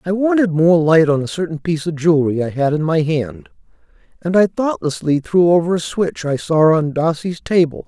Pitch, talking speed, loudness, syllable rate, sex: 165 Hz, 205 wpm, -16 LUFS, 5.3 syllables/s, male